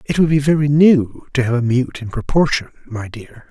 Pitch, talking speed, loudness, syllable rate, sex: 135 Hz, 220 wpm, -16 LUFS, 5.1 syllables/s, male